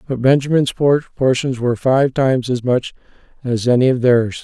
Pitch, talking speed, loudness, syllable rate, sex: 130 Hz, 160 wpm, -16 LUFS, 4.9 syllables/s, male